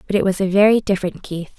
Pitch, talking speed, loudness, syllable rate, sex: 195 Hz, 265 wpm, -17 LUFS, 6.9 syllables/s, female